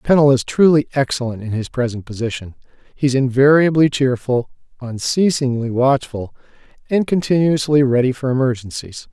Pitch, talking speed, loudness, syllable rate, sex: 130 Hz, 110 wpm, -17 LUFS, 5.2 syllables/s, male